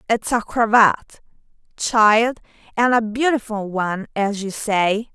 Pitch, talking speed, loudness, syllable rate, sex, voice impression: 220 Hz, 130 wpm, -19 LUFS, 4.1 syllables/s, female, feminine, adult-like, slightly bright, clear, refreshing, friendly, slightly intense